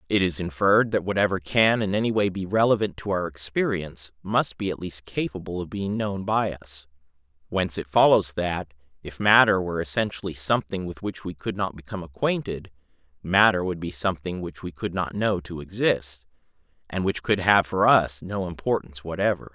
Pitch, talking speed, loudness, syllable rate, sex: 90 Hz, 185 wpm, -24 LUFS, 5.4 syllables/s, male